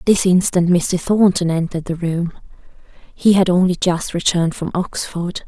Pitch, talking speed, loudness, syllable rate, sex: 175 Hz, 165 wpm, -17 LUFS, 4.9 syllables/s, female